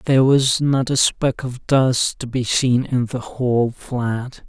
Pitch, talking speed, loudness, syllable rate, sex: 125 Hz, 190 wpm, -19 LUFS, 3.7 syllables/s, male